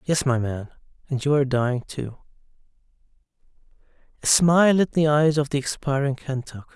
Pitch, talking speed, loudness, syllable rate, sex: 140 Hz, 150 wpm, -22 LUFS, 5.5 syllables/s, male